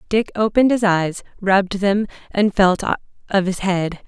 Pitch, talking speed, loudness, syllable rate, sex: 195 Hz, 160 wpm, -19 LUFS, 4.6 syllables/s, female